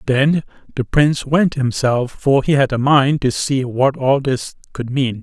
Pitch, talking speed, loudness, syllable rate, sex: 135 Hz, 195 wpm, -17 LUFS, 4.2 syllables/s, male